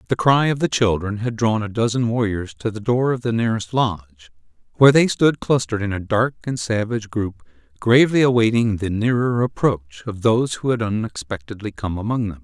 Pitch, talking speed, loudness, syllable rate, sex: 110 Hz, 195 wpm, -20 LUFS, 5.7 syllables/s, male